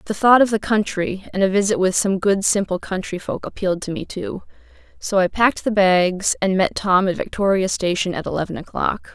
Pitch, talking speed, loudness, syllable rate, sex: 195 Hz, 210 wpm, -19 LUFS, 5.5 syllables/s, female